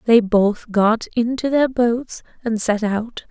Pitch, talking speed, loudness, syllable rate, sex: 225 Hz, 165 wpm, -19 LUFS, 3.5 syllables/s, female